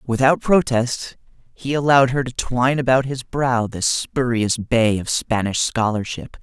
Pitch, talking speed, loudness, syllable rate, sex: 125 Hz, 150 wpm, -19 LUFS, 4.4 syllables/s, male